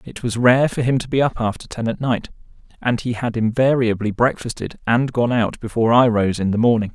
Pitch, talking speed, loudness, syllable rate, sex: 120 Hz, 225 wpm, -19 LUFS, 5.6 syllables/s, male